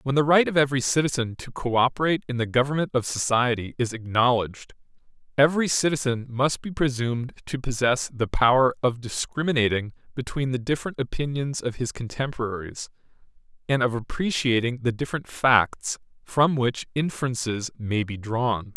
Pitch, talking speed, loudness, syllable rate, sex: 125 Hz, 145 wpm, -24 LUFS, 5.4 syllables/s, male